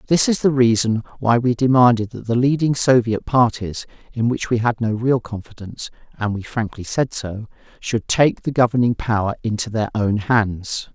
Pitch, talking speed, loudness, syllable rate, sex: 115 Hz, 180 wpm, -19 LUFS, 4.6 syllables/s, male